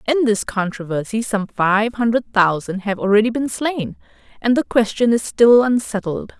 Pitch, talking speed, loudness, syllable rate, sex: 220 Hz, 160 wpm, -18 LUFS, 4.7 syllables/s, female